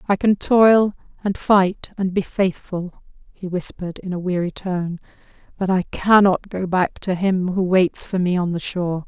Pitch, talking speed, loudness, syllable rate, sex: 185 Hz, 180 wpm, -20 LUFS, 4.4 syllables/s, female